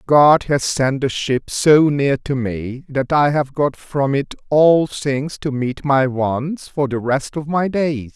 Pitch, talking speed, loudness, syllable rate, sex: 140 Hz, 200 wpm, -18 LUFS, 3.5 syllables/s, male